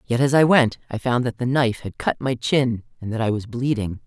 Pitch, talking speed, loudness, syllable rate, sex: 120 Hz, 265 wpm, -21 LUFS, 5.5 syllables/s, female